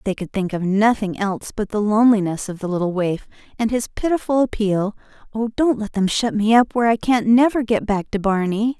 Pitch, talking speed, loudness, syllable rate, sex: 215 Hz, 220 wpm, -19 LUFS, 5.6 syllables/s, female